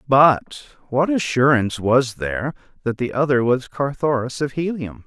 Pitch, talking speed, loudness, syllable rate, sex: 130 Hz, 140 wpm, -20 LUFS, 4.4 syllables/s, male